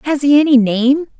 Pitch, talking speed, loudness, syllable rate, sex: 275 Hz, 200 wpm, -12 LUFS, 5.2 syllables/s, female